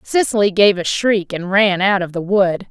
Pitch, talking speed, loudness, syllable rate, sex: 195 Hz, 220 wpm, -16 LUFS, 4.7 syllables/s, female